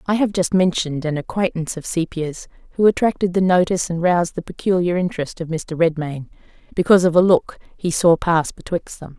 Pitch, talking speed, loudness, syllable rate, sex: 175 Hz, 190 wpm, -19 LUFS, 5.9 syllables/s, female